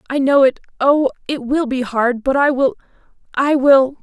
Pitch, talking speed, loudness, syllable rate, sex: 270 Hz, 150 wpm, -16 LUFS, 4.6 syllables/s, female